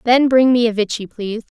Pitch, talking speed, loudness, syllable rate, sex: 230 Hz, 230 wpm, -16 LUFS, 5.9 syllables/s, female